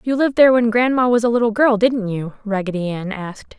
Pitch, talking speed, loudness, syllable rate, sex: 225 Hz, 235 wpm, -17 LUFS, 6.2 syllables/s, female